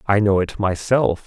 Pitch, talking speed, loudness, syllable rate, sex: 100 Hz, 190 wpm, -19 LUFS, 4.4 syllables/s, male